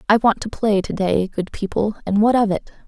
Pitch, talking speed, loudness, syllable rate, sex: 210 Hz, 250 wpm, -20 LUFS, 5.2 syllables/s, female